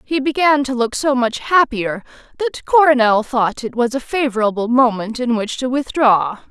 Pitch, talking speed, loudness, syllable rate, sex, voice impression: 250 Hz, 175 wpm, -16 LUFS, 4.7 syllables/s, female, feminine, adult-like, clear, slightly cool, slightly intellectual, slightly calm